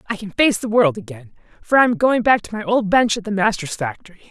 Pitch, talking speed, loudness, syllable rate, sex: 225 Hz, 250 wpm, -18 LUFS, 5.9 syllables/s, female